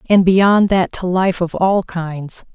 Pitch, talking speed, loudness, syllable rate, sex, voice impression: 185 Hz, 190 wpm, -15 LUFS, 3.4 syllables/s, female, feminine, adult-like, tensed, slightly dark, soft, clear, intellectual, calm, reassuring, elegant, slightly lively, slightly sharp, slightly modest